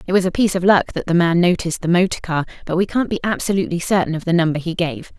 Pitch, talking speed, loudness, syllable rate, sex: 175 Hz, 280 wpm, -18 LUFS, 7.2 syllables/s, female